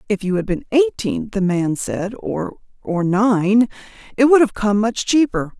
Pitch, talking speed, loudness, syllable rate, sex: 215 Hz, 170 wpm, -18 LUFS, 4.2 syllables/s, female